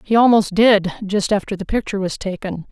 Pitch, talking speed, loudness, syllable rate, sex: 200 Hz, 175 wpm, -18 LUFS, 5.7 syllables/s, female